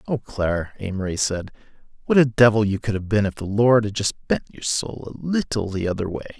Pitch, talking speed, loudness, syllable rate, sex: 105 Hz, 225 wpm, -22 LUFS, 5.6 syllables/s, male